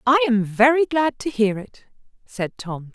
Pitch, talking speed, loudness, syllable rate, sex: 230 Hz, 185 wpm, -20 LUFS, 4.2 syllables/s, female